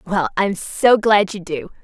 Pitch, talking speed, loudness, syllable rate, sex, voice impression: 200 Hz, 195 wpm, -17 LUFS, 4.6 syllables/s, female, very gender-neutral, adult-like, slightly middle-aged, very thin, very tensed, powerful, very bright, hard, very clear, slightly fluent, cute, very refreshing, slightly sincere, slightly calm, slightly friendly, very unique, very elegant, very lively, strict, very sharp, very light